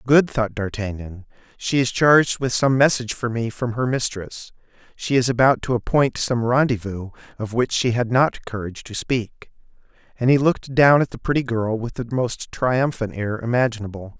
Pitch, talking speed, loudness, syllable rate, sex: 120 Hz, 180 wpm, -20 LUFS, 5.0 syllables/s, male